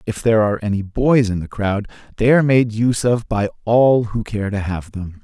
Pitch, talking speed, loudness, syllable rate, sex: 110 Hz, 230 wpm, -18 LUFS, 5.4 syllables/s, male